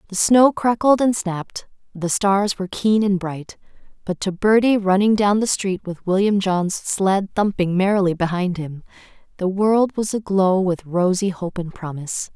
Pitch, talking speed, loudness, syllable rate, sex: 195 Hz, 170 wpm, -19 LUFS, 4.5 syllables/s, female